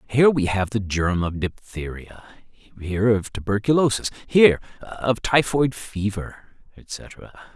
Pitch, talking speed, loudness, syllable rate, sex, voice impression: 110 Hz, 120 wpm, -22 LUFS, 4.0 syllables/s, male, masculine, middle-aged, thick, tensed, powerful, slightly hard, slightly muffled, slightly raspy, cool, intellectual, calm, mature, slightly reassuring, wild, lively, slightly strict